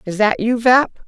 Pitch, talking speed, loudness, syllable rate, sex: 225 Hz, 225 wpm, -15 LUFS, 4.9 syllables/s, female